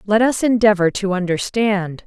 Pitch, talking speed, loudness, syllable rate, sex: 200 Hz, 145 wpm, -17 LUFS, 4.7 syllables/s, female